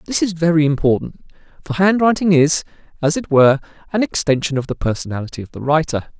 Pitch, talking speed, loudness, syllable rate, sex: 155 Hz, 175 wpm, -17 LUFS, 6.3 syllables/s, male